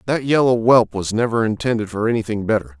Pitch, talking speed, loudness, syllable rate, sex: 115 Hz, 195 wpm, -18 LUFS, 6.1 syllables/s, male